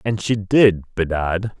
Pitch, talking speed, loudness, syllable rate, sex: 100 Hz, 150 wpm, -18 LUFS, 3.7 syllables/s, male